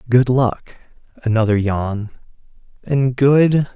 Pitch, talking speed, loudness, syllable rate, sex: 120 Hz, 65 wpm, -17 LUFS, 3.4 syllables/s, male